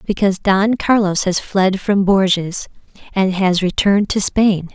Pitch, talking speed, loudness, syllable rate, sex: 195 Hz, 150 wpm, -16 LUFS, 4.3 syllables/s, female